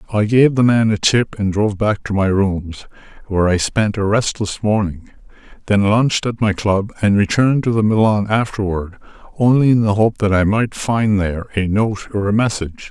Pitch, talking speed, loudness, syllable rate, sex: 105 Hz, 200 wpm, -16 LUFS, 5.2 syllables/s, male